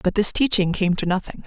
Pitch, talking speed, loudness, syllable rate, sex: 195 Hz, 245 wpm, -20 LUFS, 5.9 syllables/s, female